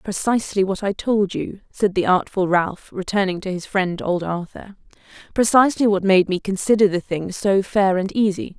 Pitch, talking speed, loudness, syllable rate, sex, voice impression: 195 Hz, 180 wpm, -20 LUFS, 4.9 syllables/s, female, very feminine, slightly young, very adult-like, thin, tensed, slightly powerful, bright, hard, very clear, very fluent, slightly raspy, cute, slightly cool, intellectual, very refreshing, very sincere, slightly calm, friendly, reassuring, slightly unique, elegant, slightly wild, slightly sweet, lively, strict, slightly intense, sharp